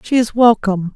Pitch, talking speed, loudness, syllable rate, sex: 220 Hz, 190 wpm, -14 LUFS, 5.9 syllables/s, female